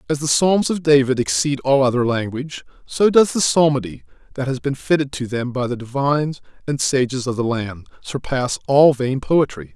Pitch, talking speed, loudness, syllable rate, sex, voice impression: 135 Hz, 190 wpm, -18 LUFS, 5.1 syllables/s, male, very masculine, very adult-like, very middle-aged, thick, slightly tensed, slightly powerful, bright, slightly soft, clear, fluent, slightly raspy, cool, intellectual, slightly refreshing, sincere, very calm, mature, friendly, reassuring, very unique, slightly elegant, wild, slightly sweet, lively, kind, slightly light